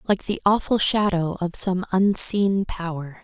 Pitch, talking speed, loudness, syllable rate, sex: 190 Hz, 150 wpm, -21 LUFS, 4.1 syllables/s, female